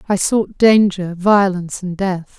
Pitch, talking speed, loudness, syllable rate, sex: 190 Hz, 150 wpm, -16 LUFS, 4.1 syllables/s, female